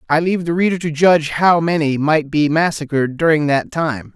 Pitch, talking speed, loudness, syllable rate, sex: 155 Hz, 200 wpm, -16 LUFS, 5.3 syllables/s, male